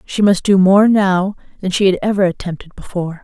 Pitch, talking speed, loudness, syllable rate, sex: 190 Hz, 205 wpm, -14 LUFS, 5.6 syllables/s, female